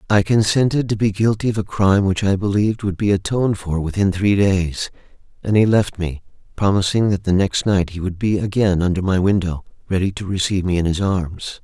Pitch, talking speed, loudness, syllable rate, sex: 100 Hz, 210 wpm, -19 LUFS, 5.6 syllables/s, male